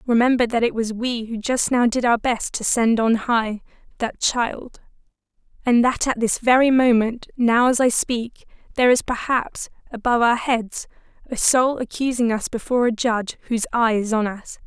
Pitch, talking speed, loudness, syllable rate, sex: 235 Hz, 185 wpm, -20 LUFS, 4.9 syllables/s, female